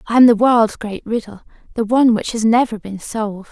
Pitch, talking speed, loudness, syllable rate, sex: 220 Hz, 220 wpm, -16 LUFS, 5.6 syllables/s, female